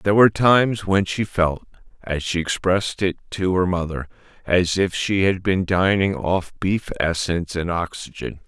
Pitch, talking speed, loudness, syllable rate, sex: 90 Hz, 170 wpm, -21 LUFS, 4.7 syllables/s, male